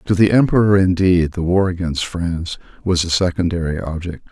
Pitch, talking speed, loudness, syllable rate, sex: 90 Hz, 165 wpm, -17 LUFS, 5.4 syllables/s, male